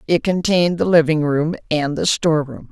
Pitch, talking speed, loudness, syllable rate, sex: 155 Hz, 175 wpm, -17 LUFS, 5.4 syllables/s, female